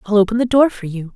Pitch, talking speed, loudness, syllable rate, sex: 215 Hz, 310 wpm, -15 LUFS, 6.7 syllables/s, female